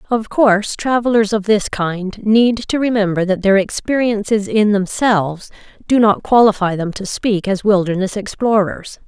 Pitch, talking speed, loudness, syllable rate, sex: 210 Hz, 150 wpm, -16 LUFS, 4.6 syllables/s, female